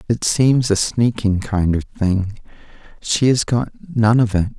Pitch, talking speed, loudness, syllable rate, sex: 110 Hz, 170 wpm, -18 LUFS, 3.9 syllables/s, male